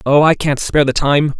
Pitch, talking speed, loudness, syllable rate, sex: 145 Hz, 260 wpm, -14 LUFS, 5.6 syllables/s, male